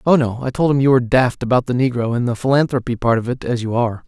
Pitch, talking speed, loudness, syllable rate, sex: 125 Hz, 295 wpm, -17 LUFS, 6.9 syllables/s, male